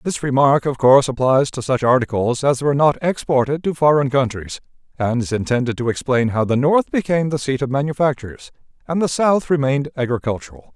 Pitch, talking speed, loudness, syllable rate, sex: 135 Hz, 185 wpm, -18 LUFS, 5.9 syllables/s, male